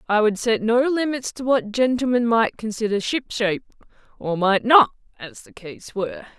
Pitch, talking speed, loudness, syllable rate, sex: 225 Hz, 170 wpm, -21 LUFS, 5.1 syllables/s, female